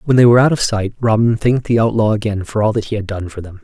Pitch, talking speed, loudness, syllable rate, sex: 110 Hz, 315 wpm, -15 LUFS, 6.9 syllables/s, male